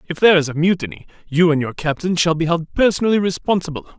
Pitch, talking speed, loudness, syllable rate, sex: 165 Hz, 210 wpm, -17 LUFS, 6.8 syllables/s, male